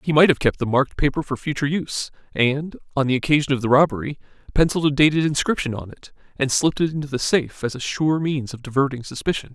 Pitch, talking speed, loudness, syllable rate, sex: 140 Hz, 225 wpm, -21 LUFS, 6.7 syllables/s, male